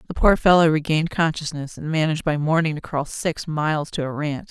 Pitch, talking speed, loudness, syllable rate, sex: 155 Hz, 215 wpm, -21 LUFS, 5.8 syllables/s, female